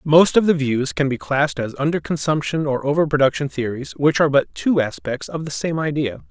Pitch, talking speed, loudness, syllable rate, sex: 145 Hz, 220 wpm, -20 LUFS, 5.6 syllables/s, male